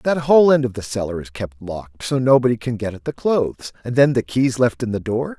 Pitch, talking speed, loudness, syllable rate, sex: 125 Hz, 270 wpm, -19 LUFS, 5.7 syllables/s, male